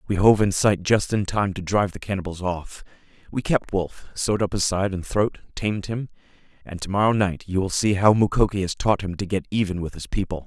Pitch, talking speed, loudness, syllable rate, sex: 95 Hz, 230 wpm, -23 LUFS, 5.7 syllables/s, male